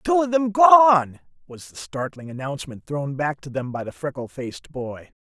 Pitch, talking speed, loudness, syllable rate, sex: 150 Hz, 195 wpm, -21 LUFS, 4.8 syllables/s, male